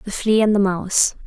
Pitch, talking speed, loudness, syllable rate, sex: 200 Hz, 240 wpm, -18 LUFS, 5.6 syllables/s, female